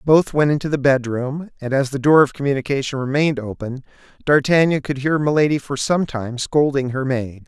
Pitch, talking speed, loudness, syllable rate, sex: 135 Hz, 185 wpm, -19 LUFS, 5.4 syllables/s, male